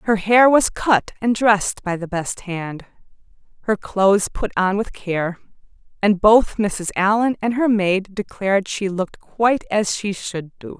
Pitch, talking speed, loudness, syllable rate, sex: 200 Hz, 170 wpm, -19 LUFS, 4.3 syllables/s, female